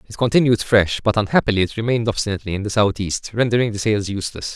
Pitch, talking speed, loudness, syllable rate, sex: 105 Hz, 200 wpm, -19 LUFS, 7.0 syllables/s, male